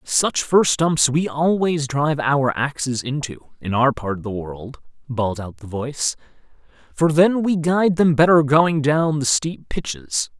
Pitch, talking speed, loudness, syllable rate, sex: 140 Hz, 175 wpm, -19 LUFS, 4.3 syllables/s, male